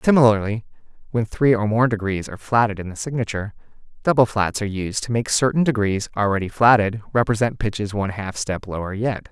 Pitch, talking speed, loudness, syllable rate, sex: 110 Hz, 180 wpm, -21 LUFS, 6.0 syllables/s, male